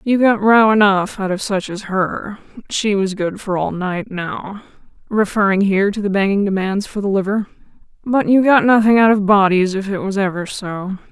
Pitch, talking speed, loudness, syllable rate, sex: 200 Hz, 195 wpm, -16 LUFS, 3.7 syllables/s, female